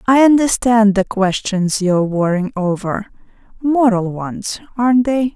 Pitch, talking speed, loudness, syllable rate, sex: 215 Hz, 125 wpm, -16 LUFS, 4.4 syllables/s, female